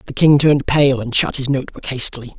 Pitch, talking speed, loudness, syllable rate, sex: 135 Hz, 250 wpm, -16 LUFS, 5.9 syllables/s, male